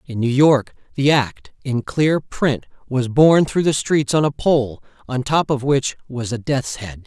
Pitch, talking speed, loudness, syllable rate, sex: 135 Hz, 185 wpm, -19 LUFS, 4.2 syllables/s, male